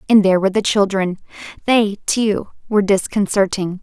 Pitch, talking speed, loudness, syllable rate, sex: 200 Hz, 125 wpm, -17 LUFS, 5.5 syllables/s, female